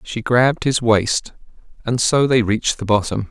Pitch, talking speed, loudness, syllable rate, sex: 115 Hz, 180 wpm, -17 LUFS, 4.8 syllables/s, male